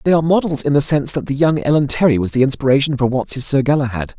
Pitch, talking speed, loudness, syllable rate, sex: 140 Hz, 260 wpm, -16 LUFS, 6.9 syllables/s, male